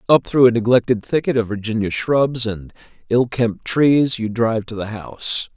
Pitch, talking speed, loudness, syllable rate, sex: 115 Hz, 185 wpm, -18 LUFS, 4.8 syllables/s, male